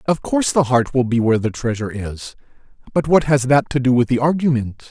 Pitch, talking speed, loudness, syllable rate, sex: 130 Hz, 230 wpm, -18 LUFS, 6.0 syllables/s, male